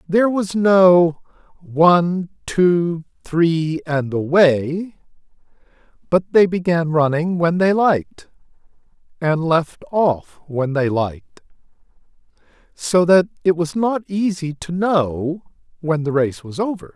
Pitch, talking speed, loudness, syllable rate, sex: 165 Hz, 120 wpm, -18 LUFS, 3.6 syllables/s, male